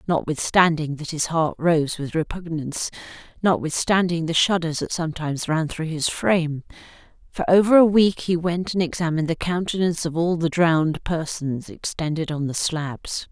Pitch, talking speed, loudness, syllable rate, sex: 165 Hz, 160 wpm, -22 LUFS, 5.0 syllables/s, female